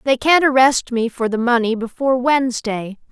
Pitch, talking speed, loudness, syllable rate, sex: 245 Hz, 175 wpm, -17 LUFS, 5.2 syllables/s, female